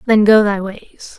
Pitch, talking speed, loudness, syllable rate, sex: 210 Hz, 205 wpm, -13 LUFS, 3.9 syllables/s, female